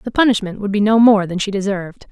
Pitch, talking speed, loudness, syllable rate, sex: 205 Hz, 255 wpm, -16 LUFS, 6.5 syllables/s, female